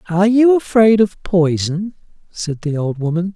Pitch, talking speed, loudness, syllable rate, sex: 185 Hz, 160 wpm, -15 LUFS, 4.6 syllables/s, male